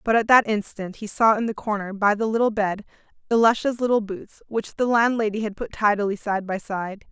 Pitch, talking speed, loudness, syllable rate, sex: 215 Hz, 210 wpm, -22 LUFS, 5.4 syllables/s, female